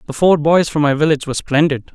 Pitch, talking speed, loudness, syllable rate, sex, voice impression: 150 Hz, 245 wpm, -15 LUFS, 6.7 syllables/s, male, very masculine, very adult-like, slightly old, very thick, tensed, very powerful, bright, slightly hard, clear, fluent, slightly cool, intellectual, slightly refreshing, sincere, calm, slightly mature, friendly, reassuring, slightly unique, slightly elegant, wild, slightly sweet, lively, kind, slightly modest